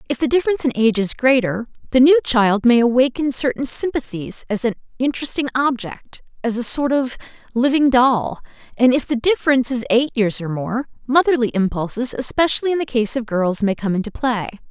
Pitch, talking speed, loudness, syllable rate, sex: 245 Hz, 185 wpm, -18 LUFS, 5.6 syllables/s, female